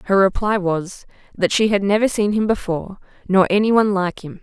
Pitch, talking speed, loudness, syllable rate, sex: 200 Hz, 205 wpm, -18 LUFS, 5.7 syllables/s, female